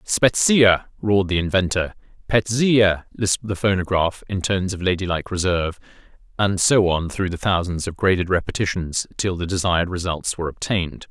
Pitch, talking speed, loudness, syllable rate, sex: 95 Hz, 145 wpm, -20 LUFS, 5.3 syllables/s, male